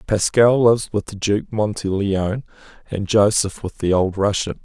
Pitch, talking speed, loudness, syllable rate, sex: 100 Hz, 155 wpm, -19 LUFS, 4.9 syllables/s, male